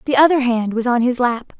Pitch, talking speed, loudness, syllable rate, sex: 250 Hz, 265 wpm, -17 LUFS, 5.6 syllables/s, female